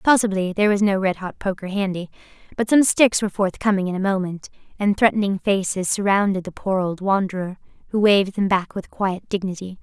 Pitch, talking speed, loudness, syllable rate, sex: 195 Hz, 190 wpm, -21 LUFS, 5.8 syllables/s, female